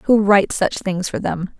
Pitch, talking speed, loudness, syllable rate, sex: 195 Hz, 225 wpm, -18 LUFS, 4.6 syllables/s, female